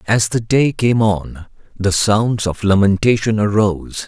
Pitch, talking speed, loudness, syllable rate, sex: 105 Hz, 145 wpm, -16 LUFS, 4.0 syllables/s, male